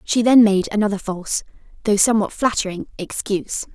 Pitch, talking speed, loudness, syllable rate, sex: 205 Hz, 145 wpm, -19 LUFS, 5.9 syllables/s, female